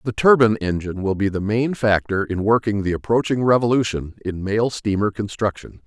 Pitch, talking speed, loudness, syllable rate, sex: 105 Hz, 175 wpm, -20 LUFS, 5.5 syllables/s, male